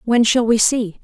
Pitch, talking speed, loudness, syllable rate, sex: 230 Hz, 235 wpm, -15 LUFS, 4.4 syllables/s, female